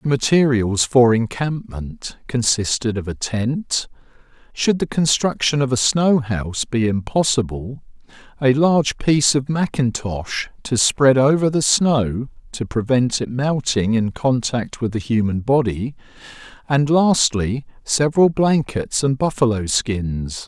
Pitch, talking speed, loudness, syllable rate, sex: 125 Hz, 130 wpm, -19 LUFS, 4.0 syllables/s, male